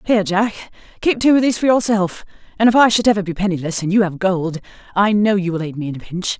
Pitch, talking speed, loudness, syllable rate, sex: 195 Hz, 265 wpm, -17 LUFS, 6.4 syllables/s, female